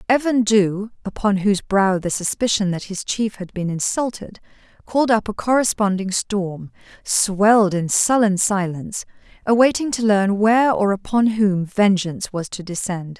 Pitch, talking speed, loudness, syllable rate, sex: 205 Hz, 150 wpm, -19 LUFS, 4.7 syllables/s, female